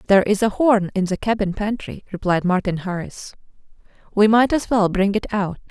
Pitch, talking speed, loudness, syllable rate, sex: 205 Hz, 190 wpm, -19 LUFS, 5.4 syllables/s, female